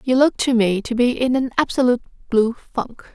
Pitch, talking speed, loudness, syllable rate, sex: 245 Hz, 210 wpm, -19 LUFS, 5.7 syllables/s, female